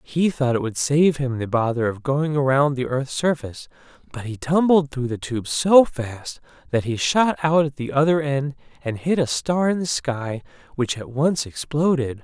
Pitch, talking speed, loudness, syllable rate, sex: 140 Hz, 200 wpm, -21 LUFS, 4.6 syllables/s, male